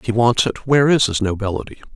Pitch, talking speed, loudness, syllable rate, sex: 115 Hz, 245 wpm, -17 LUFS, 6.8 syllables/s, male